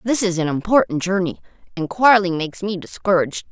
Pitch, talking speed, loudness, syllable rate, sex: 185 Hz, 170 wpm, -19 LUFS, 6.3 syllables/s, female